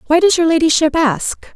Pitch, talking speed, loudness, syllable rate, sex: 315 Hz, 195 wpm, -14 LUFS, 5.3 syllables/s, female